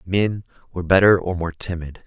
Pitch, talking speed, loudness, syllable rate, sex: 90 Hz, 175 wpm, -20 LUFS, 5.3 syllables/s, male